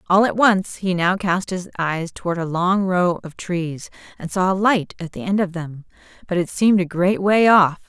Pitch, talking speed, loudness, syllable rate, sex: 180 Hz, 230 wpm, -19 LUFS, 4.7 syllables/s, female